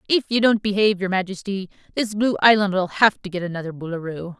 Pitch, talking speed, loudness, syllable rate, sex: 195 Hz, 190 wpm, -21 LUFS, 5.9 syllables/s, female